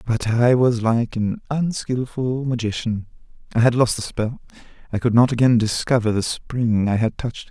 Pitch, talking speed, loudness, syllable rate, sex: 120 Hz, 175 wpm, -20 LUFS, 4.8 syllables/s, male